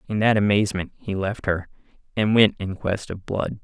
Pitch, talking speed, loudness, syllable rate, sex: 100 Hz, 200 wpm, -23 LUFS, 5.1 syllables/s, male